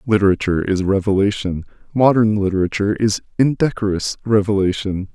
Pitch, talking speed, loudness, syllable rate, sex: 100 Hz, 95 wpm, -18 LUFS, 5.9 syllables/s, male